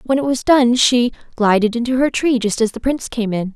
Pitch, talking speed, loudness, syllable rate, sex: 240 Hz, 255 wpm, -16 LUFS, 5.6 syllables/s, female